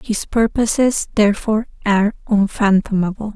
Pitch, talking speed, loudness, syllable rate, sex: 210 Hz, 90 wpm, -17 LUFS, 5.1 syllables/s, female